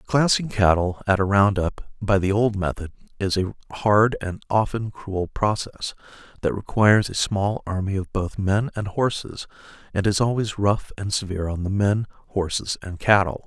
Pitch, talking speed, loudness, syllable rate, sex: 100 Hz, 175 wpm, -23 LUFS, 4.7 syllables/s, male